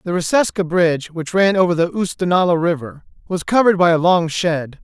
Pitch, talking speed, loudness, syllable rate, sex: 175 Hz, 185 wpm, -17 LUFS, 5.6 syllables/s, male